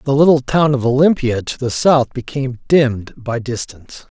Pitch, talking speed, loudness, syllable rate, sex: 130 Hz, 170 wpm, -16 LUFS, 5.1 syllables/s, male